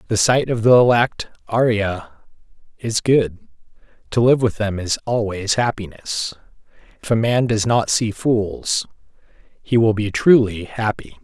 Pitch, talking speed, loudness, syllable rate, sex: 110 Hz, 145 wpm, -18 LUFS, 4.2 syllables/s, male